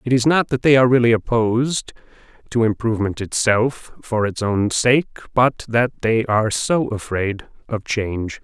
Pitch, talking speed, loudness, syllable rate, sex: 115 Hz, 165 wpm, -19 LUFS, 4.7 syllables/s, male